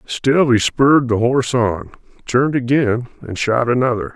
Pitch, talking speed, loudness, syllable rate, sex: 120 Hz, 160 wpm, -16 LUFS, 4.8 syllables/s, male